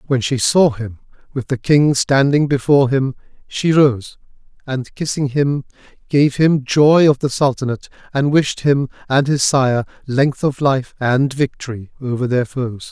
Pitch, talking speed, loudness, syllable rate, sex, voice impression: 135 Hz, 165 wpm, -16 LUFS, 4.3 syllables/s, male, masculine, middle-aged, tensed, powerful, slightly bright, slightly muffled, intellectual, calm, slightly mature, friendly, wild, slightly lively, slightly kind